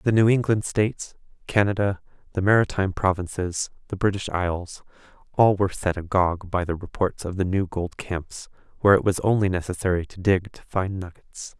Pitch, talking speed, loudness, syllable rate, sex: 95 Hz, 165 wpm, -24 LUFS, 5.4 syllables/s, male